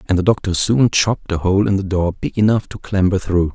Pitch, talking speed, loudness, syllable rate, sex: 95 Hz, 255 wpm, -17 LUFS, 5.6 syllables/s, male